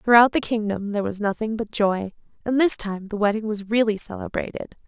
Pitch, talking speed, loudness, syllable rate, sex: 215 Hz, 195 wpm, -23 LUFS, 5.6 syllables/s, female